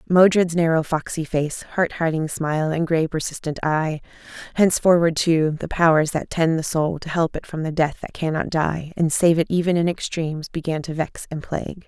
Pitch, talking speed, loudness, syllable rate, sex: 160 Hz, 195 wpm, -21 LUFS, 5.1 syllables/s, female